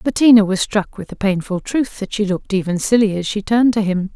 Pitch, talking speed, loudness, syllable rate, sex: 205 Hz, 245 wpm, -17 LUFS, 5.9 syllables/s, female